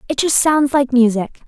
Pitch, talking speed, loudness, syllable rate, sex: 265 Hz, 205 wpm, -15 LUFS, 4.8 syllables/s, female